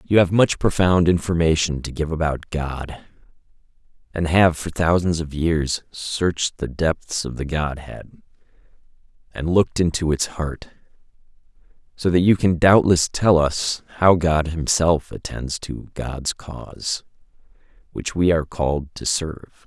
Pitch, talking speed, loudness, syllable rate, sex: 80 Hz, 140 wpm, -21 LUFS, 4.2 syllables/s, male